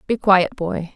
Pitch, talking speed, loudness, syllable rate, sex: 190 Hz, 190 wpm, -18 LUFS, 3.8 syllables/s, female